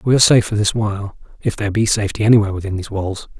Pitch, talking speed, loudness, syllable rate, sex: 105 Hz, 250 wpm, -17 LUFS, 8.3 syllables/s, male